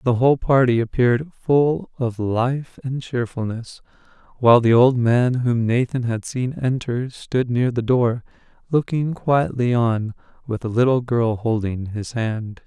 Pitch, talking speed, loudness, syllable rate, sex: 120 Hz, 150 wpm, -20 LUFS, 4.1 syllables/s, male